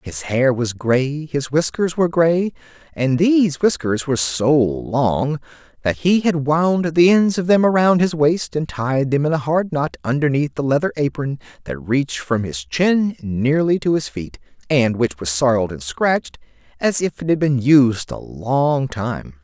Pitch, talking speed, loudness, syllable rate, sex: 140 Hz, 185 wpm, -18 LUFS, 4.3 syllables/s, male